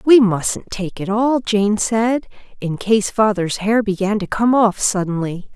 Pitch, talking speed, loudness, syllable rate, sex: 210 Hz, 175 wpm, -18 LUFS, 3.9 syllables/s, female